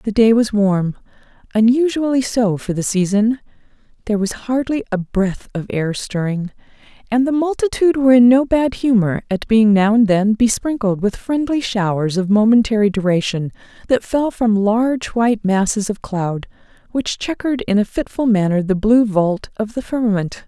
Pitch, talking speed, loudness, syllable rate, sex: 220 Hz, 160 wpm, -17 LUFS, 5.0 syllables/s, female